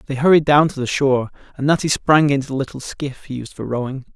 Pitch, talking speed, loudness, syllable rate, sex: 140 Hz, 245 wpm, -18 LUFS, 6.1 syllables/s, male